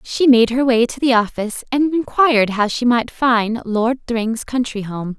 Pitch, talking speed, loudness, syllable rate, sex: 240 Hz, 195 wpm, -17 LUFS, 4.5 syllables/s, female